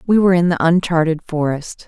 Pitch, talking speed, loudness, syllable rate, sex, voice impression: 170 Hz, 190 wpm, -16 LUFS, 5.9 syllables/s, female, feminine, adult-like, slightly sincere, slightly calm, slightly elegant, kind